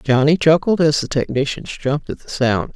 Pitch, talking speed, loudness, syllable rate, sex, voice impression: 145 Hz, 195 wpm, -17 LUFS, 5.2 syllables/s, female, masculine, slightly young, adult-like, slightly thick, tensed, slightly weak, slightly dark, slightly muffled, slightly halting